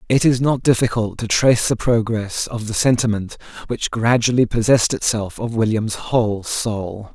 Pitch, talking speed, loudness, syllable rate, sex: 115 Hz, 160 wpm, -18 LUFS, 4.8 syllables/s, male